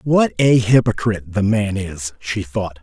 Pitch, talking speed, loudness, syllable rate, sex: 105 Hz, 170 wpm, -18 LUFS, 4.2 syllables/s, male